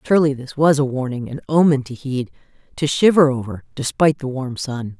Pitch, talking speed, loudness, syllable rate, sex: 135 Hz, 180 wpm, -19 LUFS, 5.7 syllables/s, female